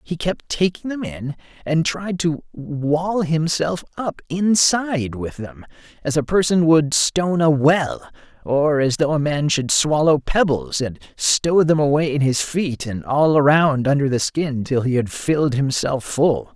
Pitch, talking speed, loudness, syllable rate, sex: 150 Hz, 175 wpm, -19 LUFS, 4.1 syllables/s, male